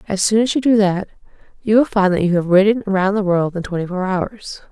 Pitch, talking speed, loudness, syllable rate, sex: 200 Hz, 255 wpm, -17 LUFS, 5.6 syllables/s, female